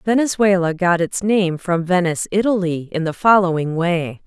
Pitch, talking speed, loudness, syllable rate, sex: 180 Hz, 155 wpm, -18 LUFS, 4.9 syllables/s, female